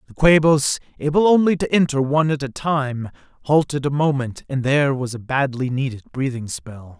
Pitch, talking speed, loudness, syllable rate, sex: 140 Hz, 180 wpm, -19 LUFS, 5.4 syllables/s, male